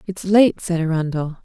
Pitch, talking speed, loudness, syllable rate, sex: 175 Hz, 165 wpm, -18 LUFS, 4.7 syllables/s, female